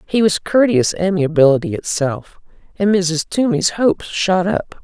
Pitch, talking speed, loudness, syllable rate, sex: 185 Hz, 135 wpm, -16 LUFS, 4.6 syllables/s, female